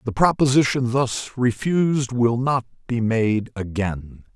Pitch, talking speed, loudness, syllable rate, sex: 120 Hz, 125 wpm, -21 LUFS, 3.9 syllables/s, male